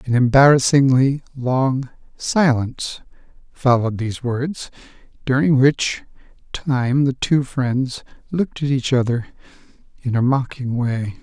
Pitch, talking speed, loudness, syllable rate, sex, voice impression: 130 Hz, 110 wpm, -19 LUFS, 4.2 syllables/s, male, masculine, slightly old, slightly refreshing, sincere, calm, elegant, kind